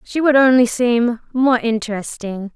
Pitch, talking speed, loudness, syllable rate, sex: 240 Hz, 140 wpm, -17 LUFS, 4.3 syllables/s, female